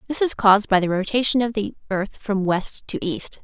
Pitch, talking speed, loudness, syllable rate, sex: 210 Hz, 225 wpm, -21 LUFS, 5.2 syllables/s, female